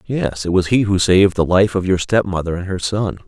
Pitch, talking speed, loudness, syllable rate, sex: 95 Hz, 275 wpm, -17 LUFS, 5.5 syllables/s, male